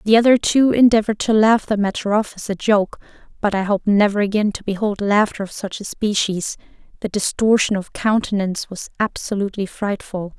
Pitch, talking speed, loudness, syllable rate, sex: 205 Hz, 180 wpm, -19 LUFS, 5.5 syllables/s, female